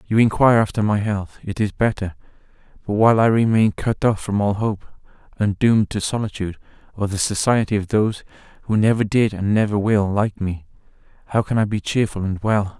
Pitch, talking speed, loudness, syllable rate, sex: 105 Hz, 190 wpm, -20 LUFS, 5.6 syllables/s, male